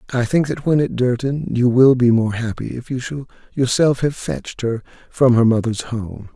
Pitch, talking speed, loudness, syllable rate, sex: 125 Hz, 210 wpm, -18 LUFS, 4.9 syllables/s, male